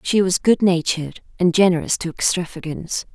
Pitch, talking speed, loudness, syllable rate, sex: 175 Hz, 135 wpm, -19 LUFS, 5.6 syllables/s, female